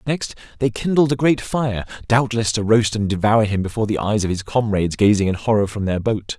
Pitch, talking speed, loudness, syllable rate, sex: 110 Hz, 215 wpm, -19 LUFS, 5.7 syllables/s, male